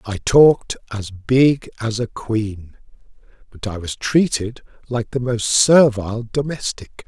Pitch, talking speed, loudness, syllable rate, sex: 115 Hz, 135 wpm, -18 LUFS, 3.7 syllables/s, male